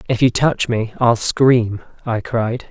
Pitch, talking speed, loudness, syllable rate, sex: 120 Hz, 175 wpm, -17 LUFS, 3.5 syllables/s, male